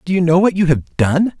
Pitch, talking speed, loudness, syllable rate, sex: 170 Hz, 300 wpm, -15 LUFS, 5.5 syllables/s, male